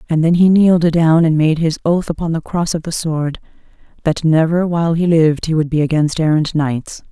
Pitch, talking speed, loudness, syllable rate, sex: 160 Hz, 220 wpm, -15 LUFS, 5.5 syllables/s, female